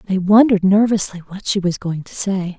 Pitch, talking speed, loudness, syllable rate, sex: 195 Hz, 210 wpm, -17 LUFS, 5.6 syllables/s, female